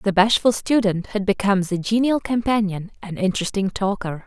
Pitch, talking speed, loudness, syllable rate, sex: 200 Hz, 155 wpm, -21 LUFS, 5.3 syllables/s, female